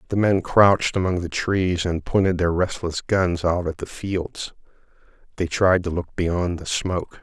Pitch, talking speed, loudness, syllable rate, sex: 90 Hz, 185 wpm, -22 LUFS, 4.4 syllables/s, male